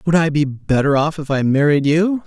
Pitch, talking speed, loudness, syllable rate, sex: 150 Hz, 240 wpm, -16 LUFS, 5.1 syllables/s, male